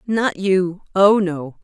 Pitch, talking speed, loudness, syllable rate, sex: 190 Hz, 110 wpm, -18 LUFS, 2.9 syllables/s, female